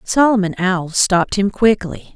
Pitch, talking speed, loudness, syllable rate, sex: 195 Hz, 140 wpm, -16 LUFS, 4.5 syllables/s, female